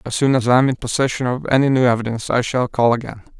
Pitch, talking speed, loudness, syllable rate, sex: 125 Hz, 265 wpm, -18 LUFS, 7.1 syllables/s, male